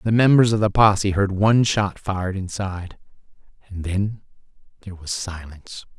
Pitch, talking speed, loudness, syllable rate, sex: 100 Hz, 150 wpm, -20 LUFS, 5.4 syllables/s, male